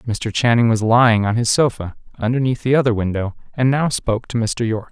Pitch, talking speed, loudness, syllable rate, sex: 115 Hz, 210 wpm, -18 LUFS, 5.8 syllables/s, male